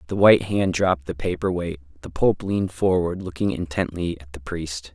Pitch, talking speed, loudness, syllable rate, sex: 85 Hz, 195 wpm, -23 LUFS, 5.3 syllables/s, male